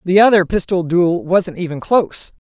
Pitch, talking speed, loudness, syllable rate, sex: 180 Hz, 170 wpm, -16 LUFS, 4.9 syllables/s, female